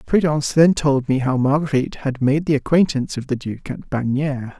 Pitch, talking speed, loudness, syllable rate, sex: 140 Hz, 195 wpm, -19 LUFS, 5.6 syllables/s, male